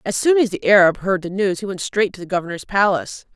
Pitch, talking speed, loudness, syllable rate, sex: 195 Hz, 270 wpm, -18 LUFS, 6.3 syllables/s, female